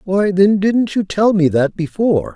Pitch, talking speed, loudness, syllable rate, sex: 195 Hz, 205 wpm, -15 LUFS, 4.4 syllables/s, male